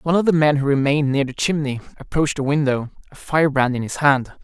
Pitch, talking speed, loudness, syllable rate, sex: 145 Hz, 230 wpm, -19 LUFS, 6.5 syllables/s, male